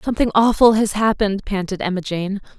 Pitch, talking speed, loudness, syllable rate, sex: 205 Hz, 165 wpm, -18 LUFS, 6.2 syllables/s, female